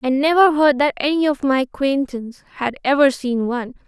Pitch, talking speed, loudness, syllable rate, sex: 275 Hz, 185 wpm, -18 LUFS, 5.6 syllables/s, female